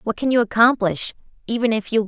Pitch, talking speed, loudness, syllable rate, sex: 220 Hz, 200 wpm, -19 LUFS, 5.9 syllables/s, female